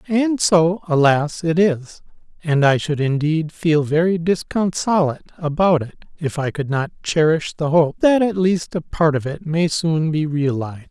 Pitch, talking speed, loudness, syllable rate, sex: 160 Hz, 175 wpm, -19 LUFS, 4.4 syllables/s, male